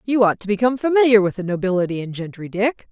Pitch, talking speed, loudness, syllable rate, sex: 210 Hz, 225 wpm, -19 LUFS, 6.9 syllables/s, female